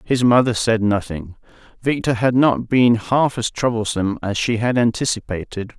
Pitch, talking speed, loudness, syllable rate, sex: 115 Hz, 155 wpm, -18 LUFS, 4.8 syllables/s, male